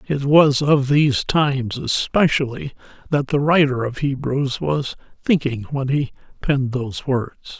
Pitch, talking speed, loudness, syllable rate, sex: 140 Hz, 140 wpm, -19 LUFS, 4.5 syllables/s, male